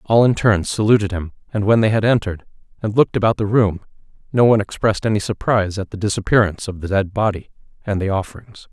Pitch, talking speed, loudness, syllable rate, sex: 105 Hz, 205 wpm, -18 LUFS, 6.7 syllables/s, male